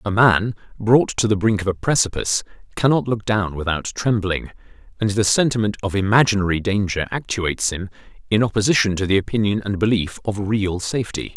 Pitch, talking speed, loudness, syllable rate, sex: 105 Hz, 170 wpm, -20 LUFS, 5.7 syllables/s, male